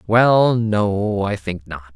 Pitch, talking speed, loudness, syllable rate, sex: 105 Hz, 155 wpm, -18 LUFS, 2.9 syllables/s, male